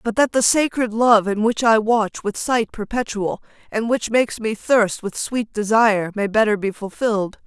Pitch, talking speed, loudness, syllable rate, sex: 220 Hz, 195 wpm, -19 LUFS, 4.7 syllables/s, female